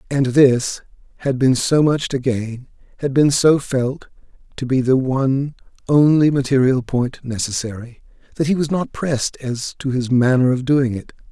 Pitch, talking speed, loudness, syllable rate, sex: 130 Hz, 170 wpm, -18 LUFS, 4.6 syllables/s, male